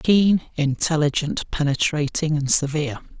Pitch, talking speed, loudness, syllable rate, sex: 150 Hz, 95 wpm, -21 LUFS, 4.6 syllables/s, male